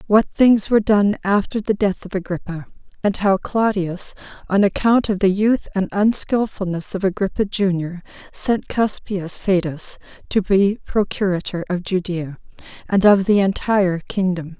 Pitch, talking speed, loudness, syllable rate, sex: 195 Hz, 145 wpm, -19 LUFS, 4.6 syllables/s, female